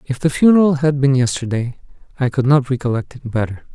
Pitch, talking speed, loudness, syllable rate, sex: 135 Hz, 190 wpm, -17 LUFS, 6.0 syllables/s, male